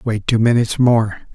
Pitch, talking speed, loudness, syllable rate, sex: 115 Hz, 180 wpm, -16 LUFS, 4.9 syllables/s, male